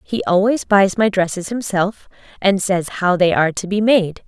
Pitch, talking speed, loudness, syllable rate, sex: 195 Hz, 195 wpm, -17 LUFS, 4.7 syllables/s, female